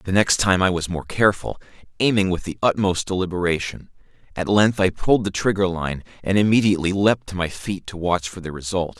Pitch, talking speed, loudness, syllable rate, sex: 95 Hz, 200 wpm, -21 LUFS, 5.7 syllables/s, male